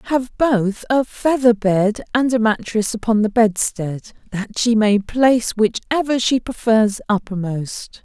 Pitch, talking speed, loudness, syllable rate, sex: 225 Hz, 140 wpm, -18 LUFS, 4.0 syllables/s, female